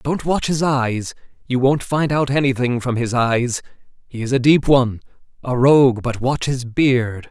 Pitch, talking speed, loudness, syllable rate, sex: 130 Hz, 180 wpm, -18 LUFS, 4.5 syllables/s, male